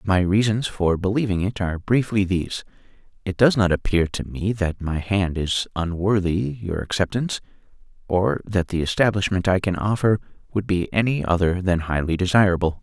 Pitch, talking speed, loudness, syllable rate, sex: 95 Hz, 165 wpm, -22 LUFS, 5.2 syllables/s, male